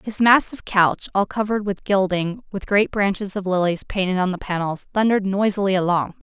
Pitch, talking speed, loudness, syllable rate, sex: 195 Hz, 180 wpm, -20 LUFS, 5.6 syllables/s, female